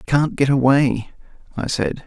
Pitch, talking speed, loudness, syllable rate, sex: 135 Hz, 145 wpm, -19 LUFS, 4.1 syllables/s, male